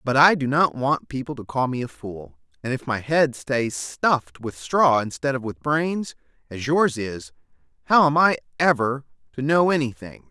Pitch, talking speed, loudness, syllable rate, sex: 130 Hz, 190 wpm, -22 LUFS, 4.6 syllables/s, male